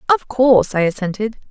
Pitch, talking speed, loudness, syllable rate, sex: 220 Hz, 160 wpm, -16 LUFS, 6.2 syllables/s, female